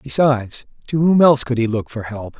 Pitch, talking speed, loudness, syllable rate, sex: 125 Hz, 225 wpm, -17 LUFS, 5.6 syllables/s, male